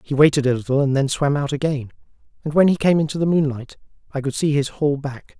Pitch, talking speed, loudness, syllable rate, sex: 145 Hz, 245 wpm, -20 LUFS, 6.3 syllables/s, male